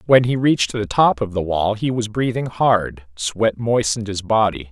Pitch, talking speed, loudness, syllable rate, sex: 105 Hz, 205 wpm, -19 LUFS, 4.7 syllables/s, male